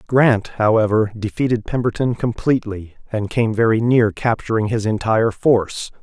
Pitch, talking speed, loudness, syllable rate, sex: 110 Hz, 130 wpm, -18 LUFS, 5.1 syllables/s, male